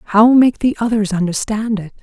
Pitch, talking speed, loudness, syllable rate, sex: 215 Hz, 180 wpm, -15 LUFS, 4.8 syllables/s, female